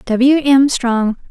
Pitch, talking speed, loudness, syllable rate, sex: 255 Hz, 140 wpm, -13 LUFS, 2.7 syllables/s, female